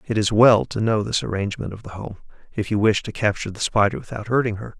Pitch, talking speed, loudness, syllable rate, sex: 105 Hz, 250 wpm, -21 LUFS, 6.4 syllables/s, male